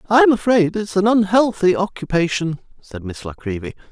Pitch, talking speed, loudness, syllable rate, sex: 175 Hz, 185 wpm, -18 LUFS, 5.7 syllables/s, male